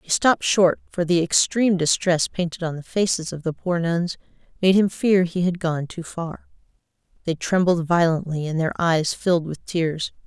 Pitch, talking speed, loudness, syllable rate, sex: 170 Hz, 185 wpm, -21 LUFS, 4.8 syllables/s, female